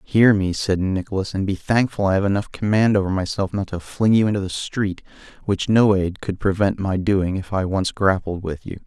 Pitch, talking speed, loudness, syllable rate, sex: 100 Hz, 225 wpm, -20 LUFS, 5.2 syllables/s, male